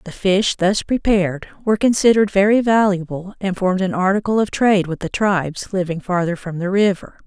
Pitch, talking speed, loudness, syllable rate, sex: 190 Hz, 180 wpm, -18 LUFS, 5.7 syllables/s, female